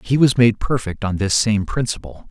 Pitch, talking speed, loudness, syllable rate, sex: 110 Hz, 210 wpm, -18 LUFS, 5.0 syllables/s, male